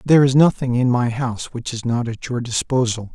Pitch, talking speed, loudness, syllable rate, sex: 125 Hz, 230 wpm, -19 LUFS, 5.6 syllables/s, male